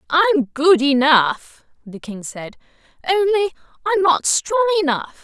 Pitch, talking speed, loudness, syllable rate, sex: 310 Hz, 125 wpm, -17 LUFS, 3.9 syllables/s, female